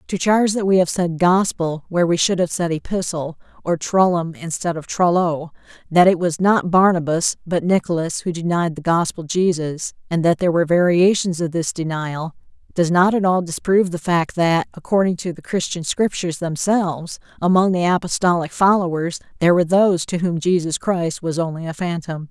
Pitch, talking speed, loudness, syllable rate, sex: 175 Hz, 180 wpm, -19 LUFS, 5.3 syllables/s, female